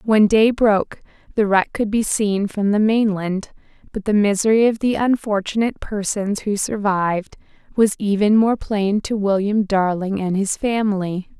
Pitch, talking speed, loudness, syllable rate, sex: 205 Hz, 160 wpm, -19 LUFS, 4.6 syllables/s, female